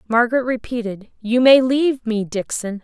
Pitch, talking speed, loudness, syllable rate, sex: 235 Hz, 150 wpm, -18 LUFS, 5.1 syllables/s, female